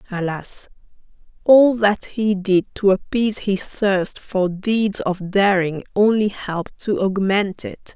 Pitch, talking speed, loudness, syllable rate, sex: 200 Hz, 135 wpm, -19 LUFS, 3.7 syllables/s, female